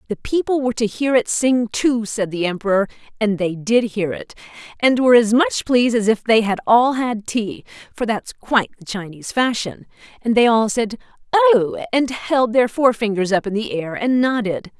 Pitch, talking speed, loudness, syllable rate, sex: 225 Hz, 200 wpm, -18 LUFS, 5.0 syllables/s, female